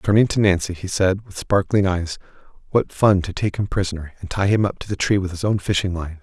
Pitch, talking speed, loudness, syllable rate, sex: 95 Hz, 250 wpm, -21 LUFS, 5.7 syllables/s, male